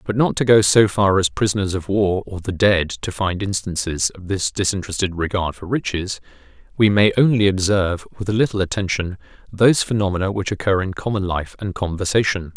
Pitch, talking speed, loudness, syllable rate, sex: 95 Hz, 185 wpm, -19 LUFS, 5.6 syllables/s, male